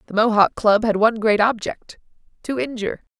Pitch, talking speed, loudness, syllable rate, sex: 215 Hz, 150 wpm, -19 LUFS, 5.7 syllables/s, female